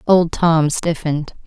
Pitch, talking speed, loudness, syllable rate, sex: 160 Hz, 125 wpm, -17 LUFS, 4.0 syllables/s, female